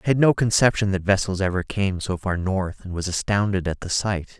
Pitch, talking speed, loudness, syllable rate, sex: 95 Hz, 230 wpm, -22 LUFS, 5.4 syllables/s, male